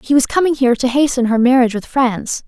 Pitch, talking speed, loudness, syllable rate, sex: 255 Hz, 240 wpm, -15 LUFS, 6.3 syllables/s, female